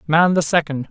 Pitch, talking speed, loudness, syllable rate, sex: 160 Hz, 200 wpm, -17 LUFS, 5.2 syllables/s, male